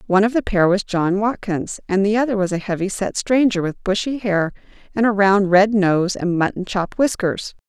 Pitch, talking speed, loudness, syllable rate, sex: 200 Hz, 210 wpm, -19 LUFS, 5.0 syllables/s, female